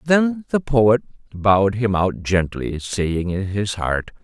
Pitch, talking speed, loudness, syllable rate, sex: 105 Hz, 155 wpm, -20 LUFS, 3.5 syllables/s, male